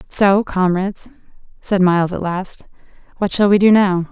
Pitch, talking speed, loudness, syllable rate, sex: 190 Hz, 160 wpm, -16 LUFS, 4.7 syllables/s, female